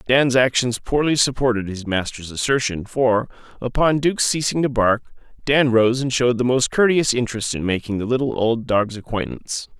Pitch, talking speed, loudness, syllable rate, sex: 120 Hz, 170 wpm, -20 LUFS, 5.4 syllables/s, male